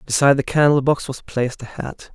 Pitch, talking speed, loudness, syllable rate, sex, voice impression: 135 Hz, 225 wpm, -19 LUFS, 5.9 syllables/s, male, masculine, adult-like, slightly thick, slightly clear, cool, slightly sincere